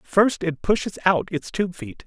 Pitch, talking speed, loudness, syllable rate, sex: 180 Hz, 205 wpm, -22 LUFS, 4.3 syllables/s, male